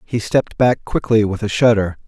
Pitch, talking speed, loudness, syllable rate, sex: 110 Hz, 200 wpm, -17 LUFS, 5.2 syllables/s, male